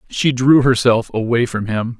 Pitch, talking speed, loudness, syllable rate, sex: 120 Hz, 180 wpm, -16 LUFS, 4.6 syllables/s, male